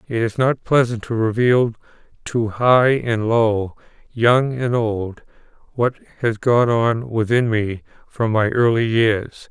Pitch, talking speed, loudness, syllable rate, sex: 115 Hz, 145 wpm, -18 LUFS, 3.6 syllables/s, male